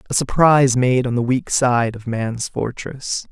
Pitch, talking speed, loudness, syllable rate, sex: 125 Hz, 180 wpm, -18 LUFS, 4.2 syllables/s, male